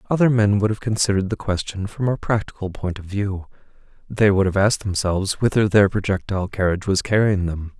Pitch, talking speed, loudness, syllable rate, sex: 100 Hz, 190 wpm, -20 LUFS, 6.0 syllables/s, male